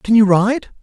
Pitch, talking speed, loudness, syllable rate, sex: 220 Hz, 220 wpm, -14 LUFS, 4.6 syllables/s, male